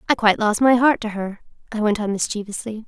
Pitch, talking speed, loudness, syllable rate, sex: 215 Hz, 230 wpm, -20 LUFS, 6.2 syllables/s, female